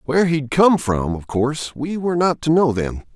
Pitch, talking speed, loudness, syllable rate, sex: 145 Hz, 230 wpm, -19 LUFS, 5.1 syllables/s, male